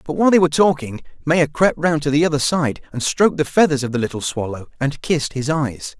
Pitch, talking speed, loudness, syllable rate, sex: 145 Hz, 240 wpm, -18 LUFS, 6.0 syllables/s, male